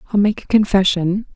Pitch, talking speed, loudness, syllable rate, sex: 200 Hz, 180 wpm, -17 LUFS, 5.7 syllables/s, female